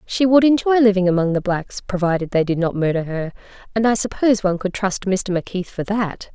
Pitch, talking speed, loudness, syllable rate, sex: 195 Hz, 215 wpm, -19 LUFS, 5.9 syllables/s, female